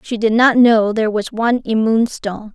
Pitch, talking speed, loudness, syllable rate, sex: 225 Hz, 210 wpm, -15 LUFS, 5.3 syllables/s, female